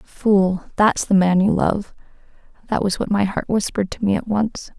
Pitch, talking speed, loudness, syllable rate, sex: 200 Hz, 200 wpm, -19 LUFS, 4.7 syllables/s, female